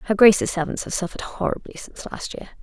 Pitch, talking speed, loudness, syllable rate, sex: 195 Hz, 205 wpm, -22 LUFS, 7.1 syllables/s, female